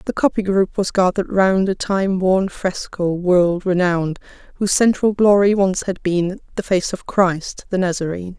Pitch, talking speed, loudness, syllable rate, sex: 190 Hz, 170 wpm, -18 LUFS, 4.7 syllables/s, female